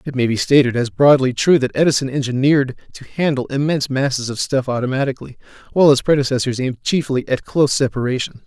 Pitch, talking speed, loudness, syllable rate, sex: 135 Hz, 175 wpm, -17 LUFS, 6.5 syllables/s, male